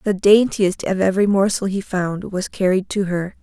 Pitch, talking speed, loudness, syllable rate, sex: 190 Hz, 195 wpm, -18 LUFS, 4.9 syllables/s, female